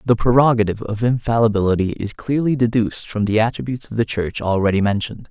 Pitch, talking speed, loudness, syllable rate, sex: 110 Hz, 170 wpm, -19 LUFS, 6.6 syllables/s, male